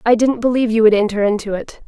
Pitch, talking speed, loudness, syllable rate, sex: 225 Hz, 255 wpm, -16 LUFS, 6.8 syllables/s, female